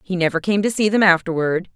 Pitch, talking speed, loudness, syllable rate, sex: 185 Hz, 240 wpm, -18 LUFS, 6.1 syllables/s, female